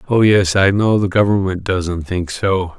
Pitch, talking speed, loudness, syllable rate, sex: 95 Hz, 195 wpm, -16 LUFS, 4.2 syllables/s, male